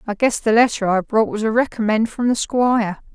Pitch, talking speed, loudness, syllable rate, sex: 225 Hz, 230 wpm, -18 LUFS, 5.5 syllables/s, female